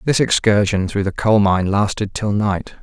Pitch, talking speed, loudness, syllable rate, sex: 105 Hz, 190 wpm, -17 LUFS, 4.6 syllables/s, male